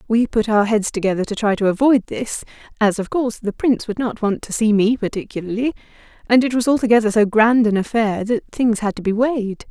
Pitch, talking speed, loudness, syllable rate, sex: 220 Hz, 215 wpm, -18 LUFS, 5.8 syllables/s, female